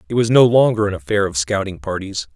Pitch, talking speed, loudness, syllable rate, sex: 100 Hz, 230 wpm, -17 LUFS, 6.1 syllables/s, male